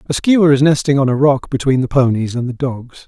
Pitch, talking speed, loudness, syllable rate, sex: 135 Hz, 255 wpm, -14 LUFS, 5.5 syllables/s, male